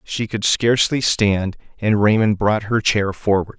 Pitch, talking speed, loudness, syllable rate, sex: 105 Hz, 165 wpm, -18 LUFS, 4.3 syllables/s, male